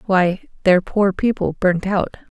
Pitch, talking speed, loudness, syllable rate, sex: 190 Hz, 155 wpm, -18 LUFS, 4.3 syllables/s, female